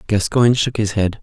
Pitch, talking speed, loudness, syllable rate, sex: 110 Hz, 195 wpm, -17 LUFS, 5.6 syllables/s, male